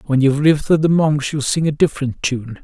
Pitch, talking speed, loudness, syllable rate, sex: 145 Hz, 250 wpm, -17 LUFS, 6.1 syllables/s, male